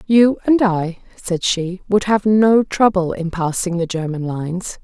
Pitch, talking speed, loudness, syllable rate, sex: 190 Hz, 175 wpm, -17 LUFS, 4.1 syllables/s, female